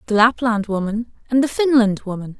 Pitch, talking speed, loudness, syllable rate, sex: 225 Hz, 175 wpm, -19 LUFS, 5.3 syllables/s, female